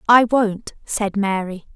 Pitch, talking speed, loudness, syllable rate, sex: 210 Hz, 135 wpm, -19 LUFS, 3.5 syllables/s, female